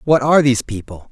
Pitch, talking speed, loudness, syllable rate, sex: 125 Hz, 215 wpm, -14 LUFS, 7.1 syllables/s, male